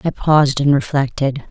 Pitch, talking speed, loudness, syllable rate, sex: 140 Hz, 160 wpm, -16 LUFS, 5.0 syllables/s, female